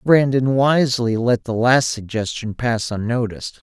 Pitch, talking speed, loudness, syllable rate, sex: 120 Hz, 130 wpm, -19 LUFS, 4.5 syllables/s, male